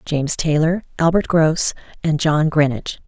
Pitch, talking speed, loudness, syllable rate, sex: 160 Hz, 135 wpm, -18 LUFS, 4.9 syllables/s, female